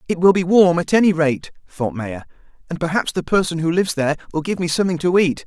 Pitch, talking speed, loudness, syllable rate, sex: 170 Hz, 240 wpm, -18 LUFS, 6.4 syllables/s, male